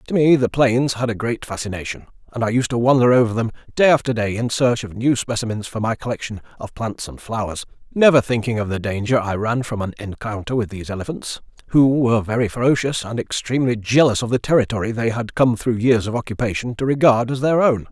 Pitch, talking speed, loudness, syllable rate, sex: 115 Hz, 220 wpm, -19 LUFS, 6.0 syllables/s, male